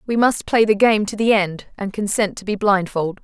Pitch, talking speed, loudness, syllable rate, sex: 205 Hz, 240 wpm, -18 LUFS, 5.3 syllables/s, female